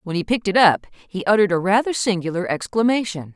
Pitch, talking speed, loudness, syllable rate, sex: 200 Hz, 195 wpm, -19 LUFS, 6.4 syllables/s, female